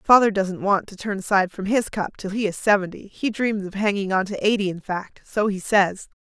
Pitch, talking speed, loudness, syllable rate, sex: 200 Hz, 240 wpm, -22 LUFS, 5.4 syllables/s, female